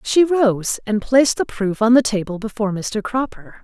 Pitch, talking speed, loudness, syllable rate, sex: 225 Hz, 200 wpm, -18 LUFS, 4.9 syllables/s, female